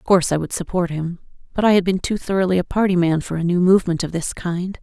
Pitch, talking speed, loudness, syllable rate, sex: 180 Hz, 275 wpm, -19 LUFS, 6.5 syllables/s, female